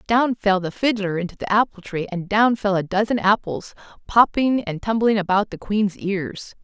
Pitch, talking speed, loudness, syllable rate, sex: 205 Hz, 190 wpm, -21 LUFS, 4.7 syllables/s, female